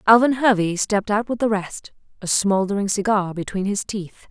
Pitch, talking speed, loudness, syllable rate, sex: 205 Hz, 180 wpm, -20 LUFS, 5.1 syllables/s, female